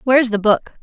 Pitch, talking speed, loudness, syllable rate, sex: 235 Hz, 220 wpm, -16 LUFS, 6.1 syllables/s, female